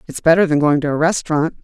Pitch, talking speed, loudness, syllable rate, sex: 155 Hz, 255 wpm, -16 LUFS, 7.1 syllables/s, female